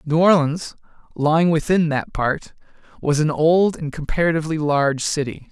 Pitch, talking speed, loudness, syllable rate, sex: 155 Hz, 140 wpm, -19 LUFS, 5.1 syllables/s, male